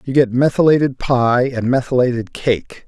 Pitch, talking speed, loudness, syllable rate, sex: 125 Hz, 145 wpm, -16 LUFS, 4.7 syllables/s, male